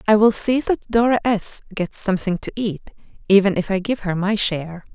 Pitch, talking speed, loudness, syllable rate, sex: 205 Hz, 205 wpm, -20 LUFS, 5.6 syllables/s, female